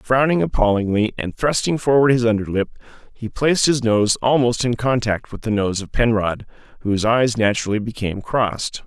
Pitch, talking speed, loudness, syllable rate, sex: 115 Hz, 160 wpm, -19 LUFS, 5.5 syllables/s, male